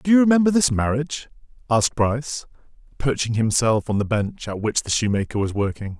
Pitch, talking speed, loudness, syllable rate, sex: 125 Hz, 180 wpm, -21 LUFS, 5.8 syllables/s, male